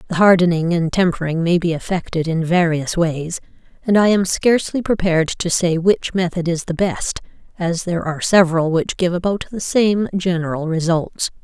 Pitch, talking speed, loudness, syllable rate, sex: 175 Hz, 175 wpm, -18 LUFS, 5.2 syllables/s, female